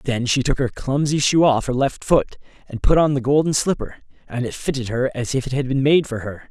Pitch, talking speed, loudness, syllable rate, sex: 135 Hz, 260 wpm, -20 LUFS, 5.6 syllables/s, male